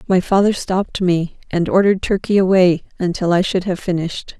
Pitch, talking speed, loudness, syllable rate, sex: 185 Hz, 180 wpm, -17 LUFS, 5.5 syllables/s, female